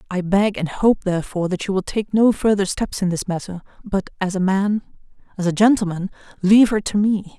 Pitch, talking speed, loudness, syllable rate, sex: 195 Hz, 210 wpm, -19 LUFS, 5.7 syllables/s, female